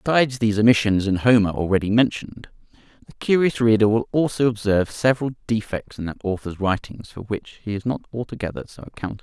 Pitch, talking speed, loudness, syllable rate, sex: 110 Hz, 180 wpm, -21 LUFS, 6.6 syllables/s, male